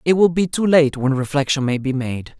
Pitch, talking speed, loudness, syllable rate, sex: 145 Hz, 250 wpm, -18 LUFS, 5.2 syllables/s, male